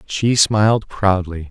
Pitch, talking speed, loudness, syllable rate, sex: 100 Hz, 120 wpm, -16 LUFS, 3.6 syllables/s, male